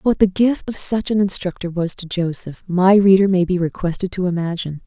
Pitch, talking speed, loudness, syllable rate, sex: 185 Hz, 210 wpm, -18 LUFS, 5.4 syllables/s, female